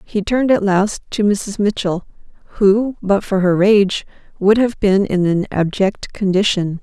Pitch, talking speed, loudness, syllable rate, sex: 200 Hz, 165 wpm, -16 LUFS, 4.2 syllables/s, female